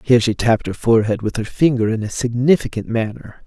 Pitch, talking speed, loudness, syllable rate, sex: 115 Hz, 210 wpm, -18 LUFS, 6.3 syllables/s, male